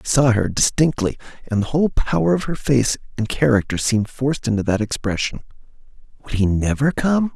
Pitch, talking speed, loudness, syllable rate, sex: 125 Hz, 170 wpm, -20 LUFS, 5.8 syllables/s, male